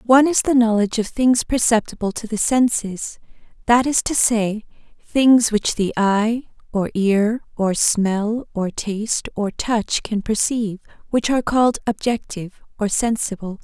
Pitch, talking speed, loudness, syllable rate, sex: 220 Hz, 145 wpm, -19 LUFS, 4.4 syllables/s, female